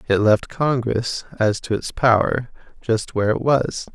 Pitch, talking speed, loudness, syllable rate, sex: 115 Hz, 165 wpm, -20 LUFS, 4.2 syllables/s, male